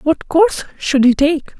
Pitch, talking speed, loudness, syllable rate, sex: 305 Hz, 190 wpm, -15 LUFS, 4.4 syllables/s, female